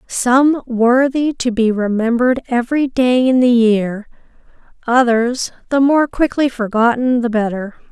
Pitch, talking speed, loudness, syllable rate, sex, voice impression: 245 Hz, 130 wpm, -15 LUFS, 4.3 syllables/s, female, feminine, slightly adult-like, slightly clear, slightly intellectual, slightly elegant